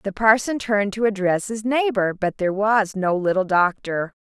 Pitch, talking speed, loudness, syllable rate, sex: 205 Hz, 185 wpm, -21 LUFS, 4.9 syllables/s, female